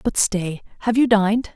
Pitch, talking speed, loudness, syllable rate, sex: 210 Hz, 155 wpm, -20 LUFS, 5.0 syllables/s, female